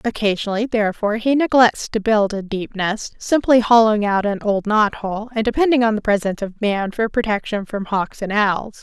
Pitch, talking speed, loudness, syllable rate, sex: 215 Hz, 195 wpm, -18 LUFS, 5.3 syllables/s, female